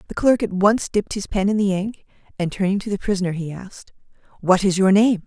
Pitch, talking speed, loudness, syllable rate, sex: 195 Hz, 240 wpm, -20 LUFS, 6.1 syllables/s, female